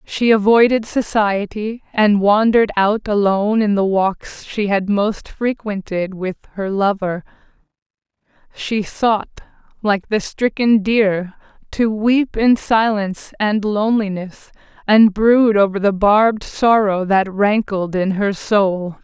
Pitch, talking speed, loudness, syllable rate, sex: 205 Hz, 125 wpm, -17 LUFS, 3.8 syllables/s, female